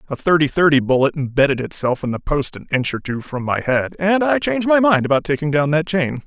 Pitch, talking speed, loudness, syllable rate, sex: 150 Hz, 250 wpm, -18 LUFS, 5.9 syllables/s, male